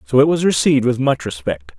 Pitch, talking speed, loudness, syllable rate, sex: 125 Hz, 235 wpm, -17 LUFS, 6.1 syllables/s, male